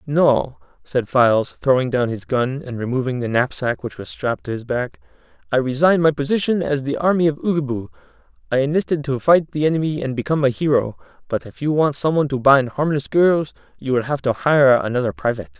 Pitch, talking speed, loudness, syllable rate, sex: 135 Hz, 205 wpm, -19 LUFS, 5.8 syllables/s, male